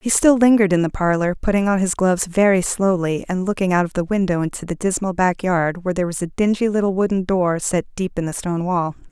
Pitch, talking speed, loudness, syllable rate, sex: 185 Hz, 235 wpm, -19 LUFS, 6.2 syllables/s, female